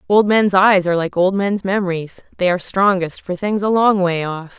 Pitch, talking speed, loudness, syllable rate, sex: 190 Hz, 220 wpm, -17 LUFS, 5.2 syllables/s, female